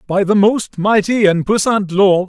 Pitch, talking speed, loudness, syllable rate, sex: 200 Hz, 185 wpm, -14 LUFS, 4.1 syllables/s, male